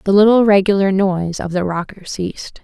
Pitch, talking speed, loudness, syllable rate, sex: 195 Hz, 180 wpm, -16 LUFS, 5.6 syllables/s, female